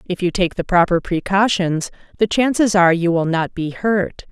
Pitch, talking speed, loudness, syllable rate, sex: 185 Hz, 195 wpm, -17 LUFS, 4.9 syllables/s, female